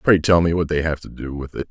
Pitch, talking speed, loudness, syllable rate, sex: 80 Hz, 355 wpm, -20 LUFS, 6.2 syllables/s, male